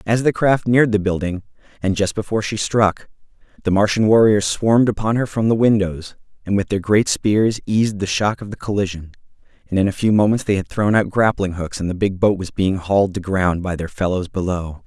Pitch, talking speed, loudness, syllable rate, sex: 100 Hz, 220 wpm, -18 LUFS, 5.6 syllables/s, male